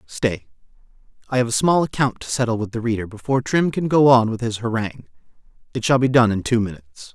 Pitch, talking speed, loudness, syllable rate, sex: 120 Hz, 200 wpm, -20 LUFS, 6.3 syllables/s, male